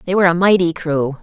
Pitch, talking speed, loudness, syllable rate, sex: 170 Hz, 245 wpm, -15 LUFS, 6.5 syllables/s, female